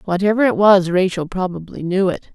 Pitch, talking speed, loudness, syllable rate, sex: 190 Hz, 180 wpm, -17 LUFS, 5.4 syllables/s, female